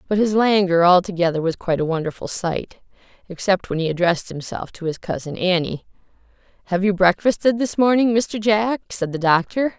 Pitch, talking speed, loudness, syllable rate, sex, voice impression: 190 Hz, 170 wpm, -20 LUFS, 5.5 syllables/s, female, gender-neutral, slightly adult-like, slightly calm, friendly, kind